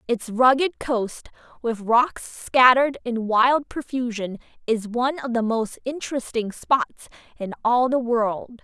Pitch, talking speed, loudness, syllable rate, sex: 240 Hz, 140 wpm, -22 LUFS, 3.9 syllables/s, female